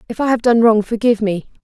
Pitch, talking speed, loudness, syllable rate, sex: 225 Hz, 255 wpm, -15 LUFS, 6.9 syllables/s, female